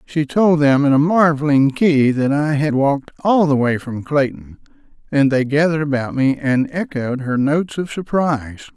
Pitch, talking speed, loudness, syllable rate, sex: 145 Hz, 185 wpm, -17 LUFS, 4.8 syllables/s, male